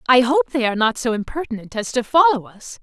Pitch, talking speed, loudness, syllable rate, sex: 250 Hz, 235 wpm, -19 LUFS, 6.1 syllables/s, female